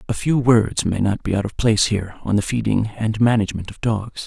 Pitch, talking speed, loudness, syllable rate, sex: 110 Hz, 240 wpm, -20 LUFS, 5.7 syllables/s, male